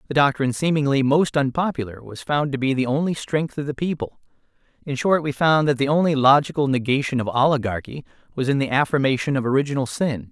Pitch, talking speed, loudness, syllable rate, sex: 140 Hz, 190 wpm, -21 LUFS, 6.1 syllables/s, male